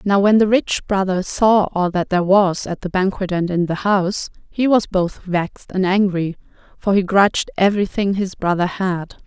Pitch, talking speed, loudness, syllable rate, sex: 190 Hz, 195 wpm, -18 LUFS, 4.9 syllables/s, female